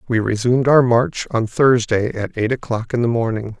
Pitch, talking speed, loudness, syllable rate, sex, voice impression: 115 Hz, 200 wpm, -18 LUFS, 5.0 syllables/s, male, very masculine, very middle-aged, very thick, slightly relaxed, powerful, bright, soft, slightly muffled, fluent, cool, intellectual, slightly refreshing, sincere, calm, slightly mature, friendly, reassuring, unique, elegant, slightly wild, slightly sweet, lively, kind, slightly modest